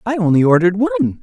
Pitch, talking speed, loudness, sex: 185 Hz, 195 wpm, -14 LUFS, female